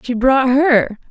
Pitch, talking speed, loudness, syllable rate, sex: 255 Hz, 165 wpm, -14 LUFS, 3.2 syllables/s, female